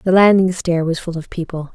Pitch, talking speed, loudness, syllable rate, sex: 175 Hz, 240 wpm, -17 LUFS, 5.3 syllables/s, female